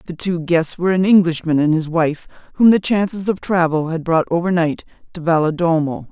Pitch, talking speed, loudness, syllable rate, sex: 170 Hz, 195 wpm, -17 LUFS, 5.4 syllables/s, female